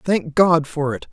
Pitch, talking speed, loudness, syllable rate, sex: 165 Hz, 215 wpm, -18 LUFS, 4.0 syllables/s, female